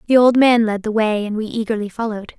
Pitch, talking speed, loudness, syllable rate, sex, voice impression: 220 Hz, 250 wpm, -17 LUFS, 6.3 syllables/s, female, very feminine, young, very thin, very tensed, powerful, very bright, soft, very clear, very fluent, slightly raspy, very cute, very intellectual, refreshing, sincere, slightly calm, very friendly, slightly reassuring, very unique, elegant, slightly wild, sweet, very lively, kind, intense, very sharp, very light